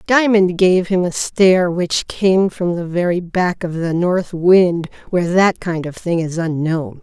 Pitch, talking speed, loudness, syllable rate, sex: 175 Hz, 190 wpm, -16 LUFS, 4.0 syllables/s, female